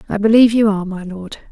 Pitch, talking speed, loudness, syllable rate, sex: 205 Hz, 240 wpm, -13 LUFS, 7.0 syllables/s, female